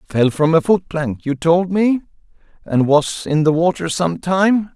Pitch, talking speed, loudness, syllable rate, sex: 165 Hz, 190 wpm, -17 LUFS, 4.0 syllables/s, male